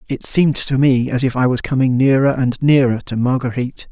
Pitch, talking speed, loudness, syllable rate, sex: 130 Hz, 215 wpm, -16 LUFS, 5.7 syllables/s, male